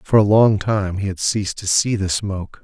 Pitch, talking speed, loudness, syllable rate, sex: 100 Hz, 250 wpm, -18 LUFS, 5.1 syllables/s, male